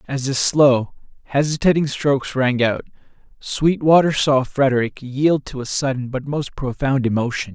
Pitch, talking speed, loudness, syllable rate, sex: 135 Hz, 145 wpm, -19 LUFS, 4.7 syllables/s, male